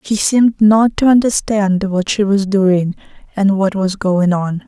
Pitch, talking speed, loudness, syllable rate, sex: 200 Hz, 180 wpm, -14 LUFS, 4.1 syllables/s, female